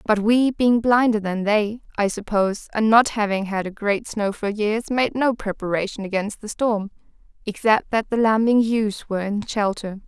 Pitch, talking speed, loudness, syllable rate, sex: 215 Hz, 185 wpm, -21 LUFS, 4.8 syllables/s, female